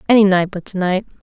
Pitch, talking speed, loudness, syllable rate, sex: 190 Hz, 235 wpm, -17 LUFS, 6.8 syllables/s, female